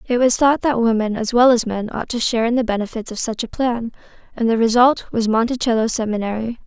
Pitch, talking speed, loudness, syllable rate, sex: 230 Hz, 225 wpm, -18 LUFS, 5.9 syllables/s, female